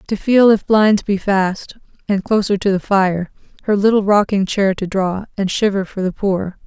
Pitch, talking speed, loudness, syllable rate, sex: 200 Hz, 200 wpm, -16 LUFS, 4.6 syllables/s, female